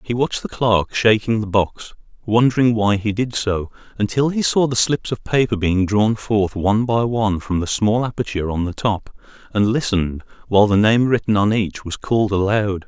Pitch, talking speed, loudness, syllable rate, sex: 110 Hz, 200 wpm, -18 LUFS, 5.2 syllables/s, male